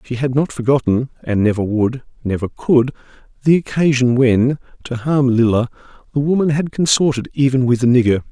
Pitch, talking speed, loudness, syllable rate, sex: 130 Hz, 145 wpm, -16 LUFS, 5.3 syllables/s, male